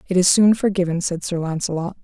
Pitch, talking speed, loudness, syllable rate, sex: 180 Hz, 205 wpm, -19 LUFS, 6.0 syllables/s, female